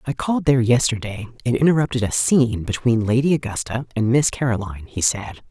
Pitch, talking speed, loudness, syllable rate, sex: 120 Hz, 175 wpm, -20 LUFS, 6.1 syllables/s, female